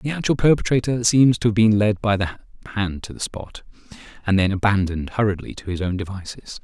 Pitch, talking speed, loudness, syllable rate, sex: 105 Hz, 200 wpm, -20 LUFS, 5.8 syllables/s, male